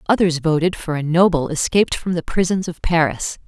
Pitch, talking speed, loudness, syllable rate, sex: 165 Hz, 190 wpm, -19 LUFS, 5.5 syllables/s, female